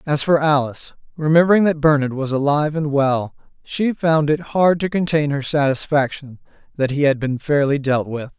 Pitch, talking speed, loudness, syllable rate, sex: 145 Hz, 180 wpm, -18 LUFS, 5.2 syllables/s, male